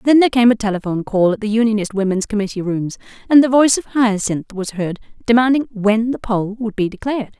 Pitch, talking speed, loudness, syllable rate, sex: 220 Hz, 210 wpm, -17 LUFS, 6.2 syllables/s, female